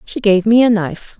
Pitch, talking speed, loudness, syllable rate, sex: 205 Hz, 250 wpm, -13 LUFS, 5.5 syllables/s, female